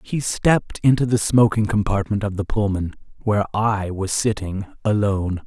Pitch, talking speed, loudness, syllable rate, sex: 105 Hz, 155 wpm, -21 LUFS, 5.0 syllables/s, male